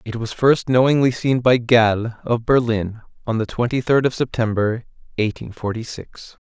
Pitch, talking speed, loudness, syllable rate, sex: 120 Hz, 165 wpm, -19 LUFS, 4.9 syllables/s, male